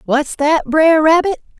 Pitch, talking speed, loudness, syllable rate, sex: 305 Hz, 150 wpm, -13 LUFS, 3.8 syllables/s, female